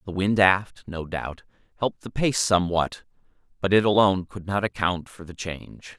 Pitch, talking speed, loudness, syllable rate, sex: 95 Hz, 180 wpm, -24 LUFS, 5.1 syllables/s, male